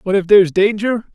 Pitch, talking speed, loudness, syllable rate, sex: 200 Hz, 210 wpm, -14 LUFS, 6.3 syllables/s, male